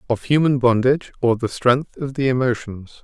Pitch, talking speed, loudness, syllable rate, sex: 125 Hz, 180 wpm, -19 LUFS, 5.1 syllables/s, male